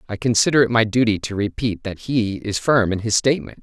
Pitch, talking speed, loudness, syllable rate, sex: 110 Hz, 230 wpm, -19 LUFS, 5.8 syllables/s, male